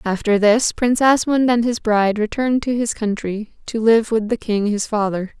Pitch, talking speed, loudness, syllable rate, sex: 220 Hz, 200 wpm, -18 LUFS, 5.2 syllables/s, female